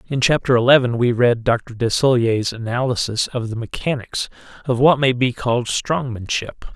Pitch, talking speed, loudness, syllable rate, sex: 120 Hz, 150 wpm, -19 LUFS, 5.1 syllables/s, male